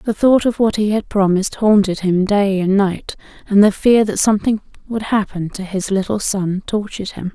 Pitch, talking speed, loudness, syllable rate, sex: 200 Hz, 205 wpm, -16 LUFS, 5.1 syllables/s, female